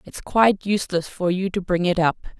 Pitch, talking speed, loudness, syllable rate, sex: 185 Hz, 225 wpm, -21 LUFS, 5.7 syllables/s, female